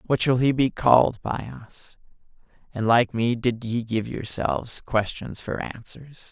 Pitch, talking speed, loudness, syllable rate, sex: 120 Hz, 160 wpm, -24 LUFS, 4.1 syllables/s, male